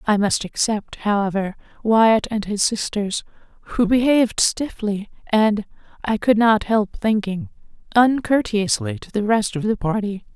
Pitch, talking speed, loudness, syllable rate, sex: 215 Hz, 140 wpm, -20 LUFS, 4.3 syllables/s, female